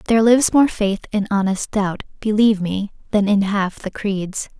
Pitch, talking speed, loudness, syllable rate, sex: 205 Hz, 185 wpm, -19 LUFS, 5.0 syllables/s, female